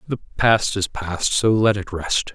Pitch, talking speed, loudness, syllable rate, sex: 105 Hz, 205 wpm, -20 LUFS, 3.9 syllables/s, male